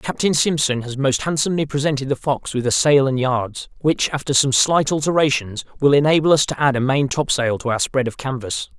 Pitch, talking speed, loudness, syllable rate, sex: 135 Hz, 210 wpm, -18 LUFS, 5.5 syllables/s, male